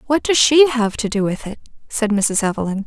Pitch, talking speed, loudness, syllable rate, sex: 230 Hz, 230 wpm, -17 LUFS, 5.4 syllables/s, female